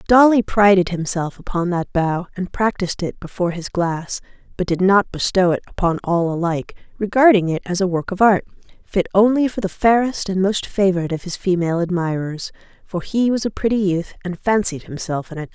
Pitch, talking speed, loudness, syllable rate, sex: 185 Hz, 195 wpm, -19 LUFS, 5.6 syllables/s, female